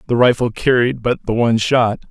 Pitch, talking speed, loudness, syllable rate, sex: 120 Hz, 200 wpm, -16 LUFS, 5.6 syllables/s, male